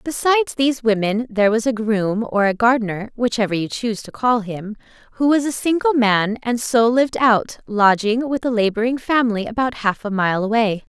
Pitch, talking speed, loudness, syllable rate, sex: 230 Hz, 190 wpm, -18 LUFS, 4.7 syllables/s, female